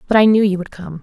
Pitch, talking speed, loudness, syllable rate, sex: 195 Hz, 350 wpm, -15 LUFS, 6.9 syllables/s, female